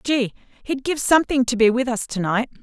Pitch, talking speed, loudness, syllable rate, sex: 250 Hz, 230 wpm, -20 LUFS, 5.7 syllables/s, female